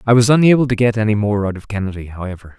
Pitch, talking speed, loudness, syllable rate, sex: 110 Hz, 255 wpm, -15 LUFS, 7.4 syllables/s, male